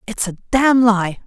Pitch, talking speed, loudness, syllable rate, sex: 220 Hz, 190 wpm, -16 LUFS, 4.2 syllables/s, female